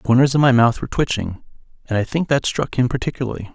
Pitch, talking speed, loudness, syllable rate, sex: 125 Hz, 235 wpm, -19 LUFS, 6.8 syllables/s, male